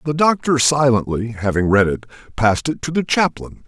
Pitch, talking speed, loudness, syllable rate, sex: 130 Hz, 180 wpm, -17 LUFS, 5.3 syllables/s, male